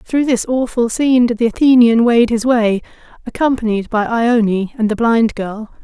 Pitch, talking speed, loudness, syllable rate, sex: 230 Hz, 175 wpm, -14 LUFS, 4.7 syllables/s, female